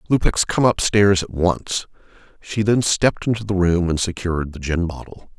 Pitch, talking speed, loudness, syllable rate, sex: 95 Hz, 180 wpm, -19 LUFS, 5.0 syllables/s, male